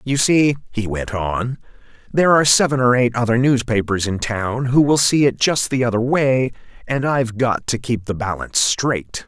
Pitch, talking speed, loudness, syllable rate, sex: 125 Hz, 195 wpm, -18 LUFS, 4.9 syllables/s, male